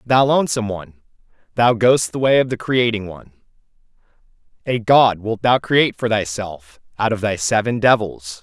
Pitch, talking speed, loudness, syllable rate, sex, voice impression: 110 Hz, 165 wpm, -17 LUFS, 5.3 syllables/s, male, masculine, adult-like, tensed, bright, slightly fluent, cool, intellectual, refreshing, sincere, friendly, lively, slightly light